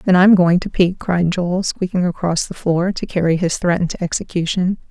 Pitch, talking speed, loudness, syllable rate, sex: 180 Hz, 210 wpm, -17 LUFS, 5.1 syllables/s, female